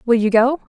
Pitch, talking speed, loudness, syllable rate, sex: 240 Hz, 235 wpm, -16 LUFS, 5.9 syllables/s, female